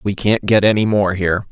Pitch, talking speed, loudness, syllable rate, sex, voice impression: 100 Hz, 240 wpm, -15 LUFS, 5.7 syllables/s, male, very masculine, middle-aged, very thick, tensed, very powerful, slightly bright, slightly soft, slightly clear, fluent, slightly raspy, very cool, very intellectual, refreshing, sincere, very calm, mature, very friendly, very reassuring, very unique, elegant, wild, sweet, lively, kind, slightly intense